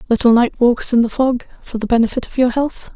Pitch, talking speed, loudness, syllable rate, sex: 240 Hz, 245 wpm, -16 LUFS, 5.8 syllables/s, female